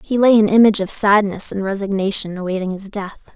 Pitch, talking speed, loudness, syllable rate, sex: 200 Hz, 195 wpm, -16 LUFS, 5.9 syllables/s, female